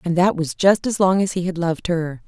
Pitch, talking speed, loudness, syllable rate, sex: 180 Hz, 290 wpm, -19 LUFS, 5.6 syllables/s, female